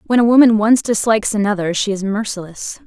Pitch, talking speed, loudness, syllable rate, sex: 215 Hz, 190 wpm, -15 LUFS, 5.9 syllables/s, female